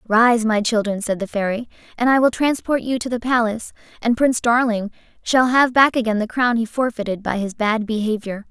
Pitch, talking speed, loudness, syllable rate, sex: 230 Hz, 205 wpm, -19 LUFS, 5.5 syllables/s, female